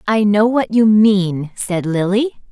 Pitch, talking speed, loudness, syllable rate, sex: 205 Hz, 165 wpm, -15 LUFS, 3.2 syllables/s, female